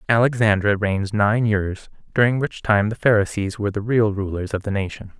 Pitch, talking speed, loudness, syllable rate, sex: 105 Hz, 185 wpm, -20 LUFS, 5.3 syllables/s, male